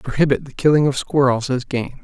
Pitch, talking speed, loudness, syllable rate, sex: 135 Hz, 205 wpm, -18 LUFS, 5.9 syllables/s, male